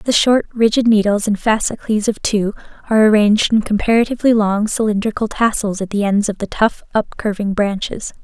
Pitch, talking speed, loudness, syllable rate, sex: 215 Hz, 175 wpm, -16 LUFS, 5.5 syllables/s, female